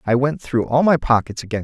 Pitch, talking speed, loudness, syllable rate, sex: 125 Hz, 255 wpm, -18 LUFS, 5.8 syllables/s, male